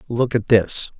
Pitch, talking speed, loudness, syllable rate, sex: 115 Hz, 180 wpm, -18 LUFS, 4.1 syllables/s, male